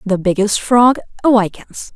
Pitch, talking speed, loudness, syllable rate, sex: 210 Hz, 125 wpm, -14 LUFS, 4.4 syllables/s, female